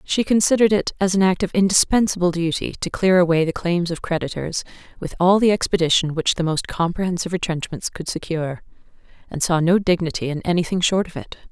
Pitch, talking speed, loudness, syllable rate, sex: 175 Hz, 190 wpm, -20 LUFS, 6.1 syllables/s, female